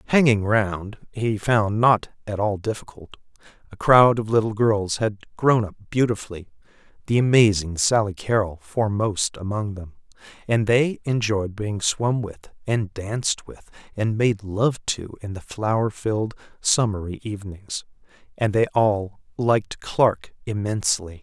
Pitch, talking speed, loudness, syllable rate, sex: 105 Hz, 135 wpm, -22 LUFS, 4.3 syllables/s, male